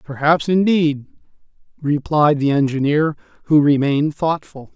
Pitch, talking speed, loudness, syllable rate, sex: 150 Hz, 100 wpm, -17 LUFS, 4.5 syllables/s, male